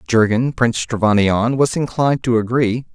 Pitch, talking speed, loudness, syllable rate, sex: 120 Hz, 140 wpm, -17 LUFS, 5.1 syllables/s, male